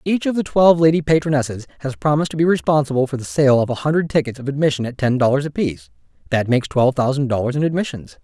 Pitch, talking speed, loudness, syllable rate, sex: 140 Hz, 220 wpm, -18 LUFS, 7.1 syllables/s, male